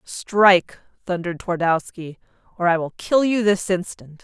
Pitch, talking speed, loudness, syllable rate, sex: 185 Hz, 140 wpm, -20 LUFS, 4.7 syllables/s, female